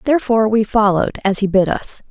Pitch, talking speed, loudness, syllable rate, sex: 210 Hz, 200 wpm, -16 LUFS, 6.4 syllables/s, female